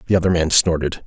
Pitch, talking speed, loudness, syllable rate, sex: 85 Hz, 225 wpm, -17 LUFS, 6.8 syllables/s, male